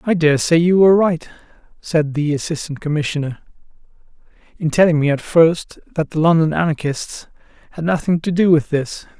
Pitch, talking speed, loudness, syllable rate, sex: 160 Hz, 155 wpm, -17 LUFS, 5.5 syllables/s, male